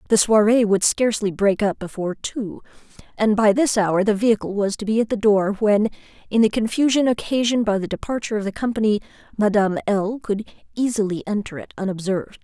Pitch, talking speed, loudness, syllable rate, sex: 210 Hz, 185 wpm, -20 LUFS, 6.1 syllables/s, female